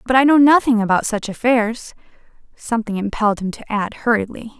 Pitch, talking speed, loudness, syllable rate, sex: 225 Hz, 170 wpm, -17 LUFS, 5.9 syllables/s, female